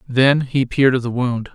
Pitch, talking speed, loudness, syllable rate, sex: 130 Hz, 235 wpm, -17 LUFS, 5.1 syllables/s, male